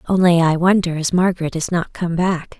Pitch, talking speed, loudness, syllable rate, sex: 175 Hz, 210 wpm, -17 LUFS, 5.4 syllables/s, female